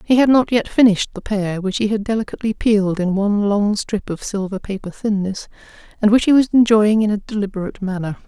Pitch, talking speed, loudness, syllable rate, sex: 205 Hz, 210 wpm, -18 LUFS, 6.1 syllables/s, female